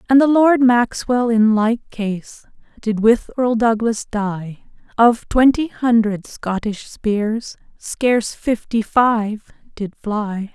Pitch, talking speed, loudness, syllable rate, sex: 225 Hz, 125 wpm, -17 LUFS, 3.4 syllables/s, female